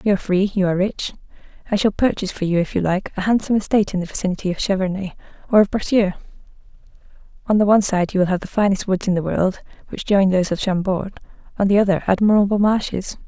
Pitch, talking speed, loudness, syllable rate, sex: 195 Hz, 215 wpm, -19 LUFS, 7.1 syllables/s, female